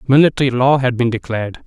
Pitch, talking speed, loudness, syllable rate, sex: 125 Hz, 180 wpm, -16 LUFS, 6.6 syllables/s, male